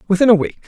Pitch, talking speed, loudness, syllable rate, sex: 185 Hz, 270 wpm, -14 LUFS, 8.7 syllables/s, male